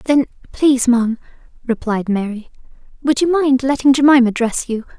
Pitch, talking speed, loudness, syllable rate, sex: 255 Hz, 145 wpm, -16 LUFS, 5.4 syllables/s, female